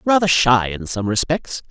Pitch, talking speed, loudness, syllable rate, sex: 135 Hz, 175 wpm, -18 LUFS, 4.5 syllables/s, male